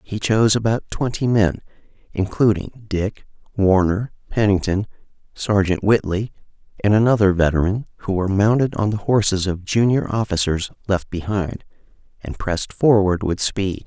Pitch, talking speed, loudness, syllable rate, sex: 100 Hz, 130 wpm, -19 LUFS, 4.9 syllables/s, male